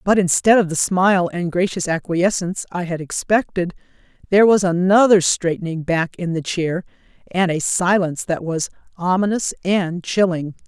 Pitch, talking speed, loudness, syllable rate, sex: 180 Hz, 150 wpm, -18 LUFS, 5.0 syllables/s, female